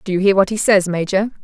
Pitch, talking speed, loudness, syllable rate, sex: 195 Hz, 295 wpm, -16 LUFS, 6.6 syllables/s, female